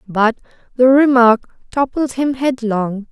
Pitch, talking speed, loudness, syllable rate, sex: 245 Hz, 115 wpm, -15 LUFS, 3.9 syllables/s, female